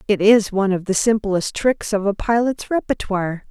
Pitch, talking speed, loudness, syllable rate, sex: 205 Hz, 190 wpm, -19 LUFS, 5.1 syllables/s, female